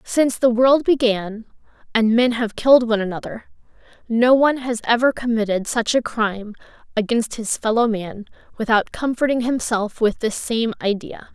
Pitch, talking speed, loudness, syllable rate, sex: 230 Hz, 155 wpm, -19 LUFS, 5.0 syllables/s, female